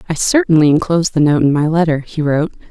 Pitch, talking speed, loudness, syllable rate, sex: 160 Hz, 220 wpm, -14 LUFS, 6.8 syllables/s, female